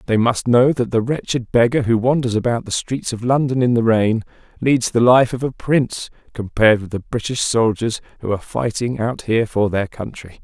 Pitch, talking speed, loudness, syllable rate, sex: 115 Hz, 205 wpm, -18 LUFS, 5.3 syllables/s, male